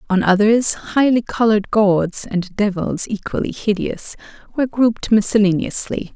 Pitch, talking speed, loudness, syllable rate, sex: 210 Hz, 115 wpm, -18 LUFS, 4.8 syllables/s, female